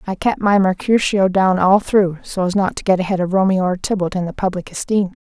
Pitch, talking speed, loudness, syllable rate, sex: 190 Hz, 230 wpm, -17 LUFS, 5.4 syllables/s, female